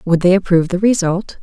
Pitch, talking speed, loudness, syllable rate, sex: 185 Hz, 210 wpm, -15 LUFS, 6.1 syllables/s, female